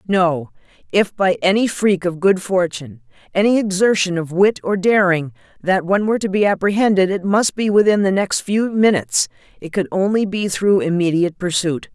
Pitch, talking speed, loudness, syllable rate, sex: 190 Hz, 175 wpm, -17 LUFS, 5.3 syllables/s, female